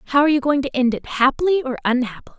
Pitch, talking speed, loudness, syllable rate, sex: 270 Hz, 225 wpm, -19 LUFS, 7.1 syllables/s, female